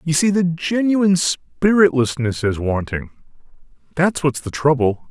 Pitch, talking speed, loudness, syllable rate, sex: 150 Hz, 130 wpm, -18 LUFS, 4.9 syllables/s, male